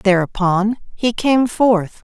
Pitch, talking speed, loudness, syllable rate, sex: 210 Hz, 110 wpm, -17 LUFS, 3.4 syllables/s, female